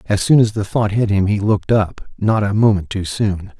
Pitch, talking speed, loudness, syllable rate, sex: 105 Hz, 235 wpm, -17 LUFS, 5.0 syllables/s, male